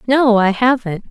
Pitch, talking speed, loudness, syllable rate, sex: 230 Hz, 165 wpm, -14 LUFS, 4.4 syllables/s, female